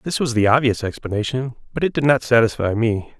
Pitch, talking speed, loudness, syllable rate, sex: 120 Hz, 205 wpm, -19 LUFS, 5.9 syllables/s, male